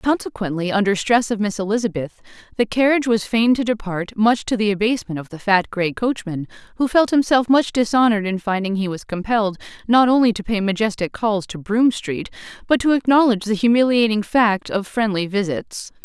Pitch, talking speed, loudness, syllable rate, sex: 215 Hz, 185 wpm, -19 LUFS, 5.6 syllables/s, female